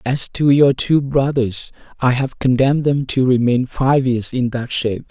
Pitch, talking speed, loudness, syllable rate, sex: 130 Hz, 190 wpm, -17 LUFS, 4.5 syllables/s, male